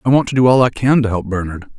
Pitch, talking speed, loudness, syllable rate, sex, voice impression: 115 Hz, 335 wpm, -15 LUFS, 7.0 syllables/s, male, very masculine, slightly old, very thick, tensed, slightly weak, slightly bright, slightly soft, slightly muffled, slightly halting, cool, very intellectual, slightly refreshing, very sincere, very calm, very mature, friendly, reassuring, very unique, slightly elegant, wild, slightly sweet, slightly lively, kind, slightly intense, modest